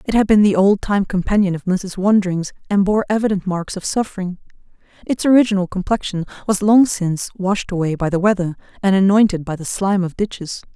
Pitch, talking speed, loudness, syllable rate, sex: 195 Hz, 190 wpm, -18 LUFS, 5.9 syllables/s, female